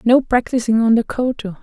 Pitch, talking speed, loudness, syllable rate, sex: 235 Hz, 185 wpm, -17 LUFS, 5.4 syllables/s, female